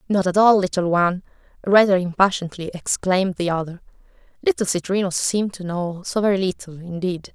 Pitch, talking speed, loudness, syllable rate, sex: 185 Hz, 155 wpm, -20 LUFS, 5.8 syllables/s, female